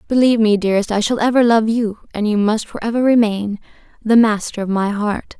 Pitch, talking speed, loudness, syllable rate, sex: 220 Hz, 210 wpm, -16 LUFS, 5.7 syllables/s, female